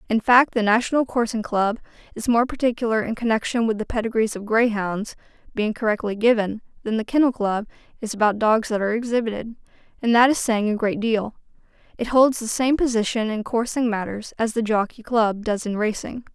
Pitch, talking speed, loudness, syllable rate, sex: 225 Hz, 185 wpm, -22 LUFS, 5.6 syllables/s, female